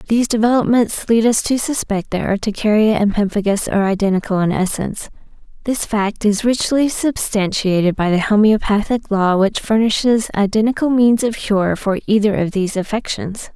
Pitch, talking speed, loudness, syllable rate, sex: 210 Hz, 150 wpm, -16 LUFS, 5.3 syllables/s, female